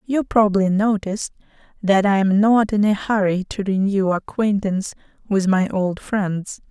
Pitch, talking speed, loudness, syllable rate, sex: 200 Hz, 150 wpm, -19 LUFS, 4.6 syllables/s, female